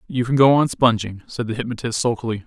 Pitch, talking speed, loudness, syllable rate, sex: 120 Hz, 220 wpm, -19 LUFS, 6.1 syllables/s, male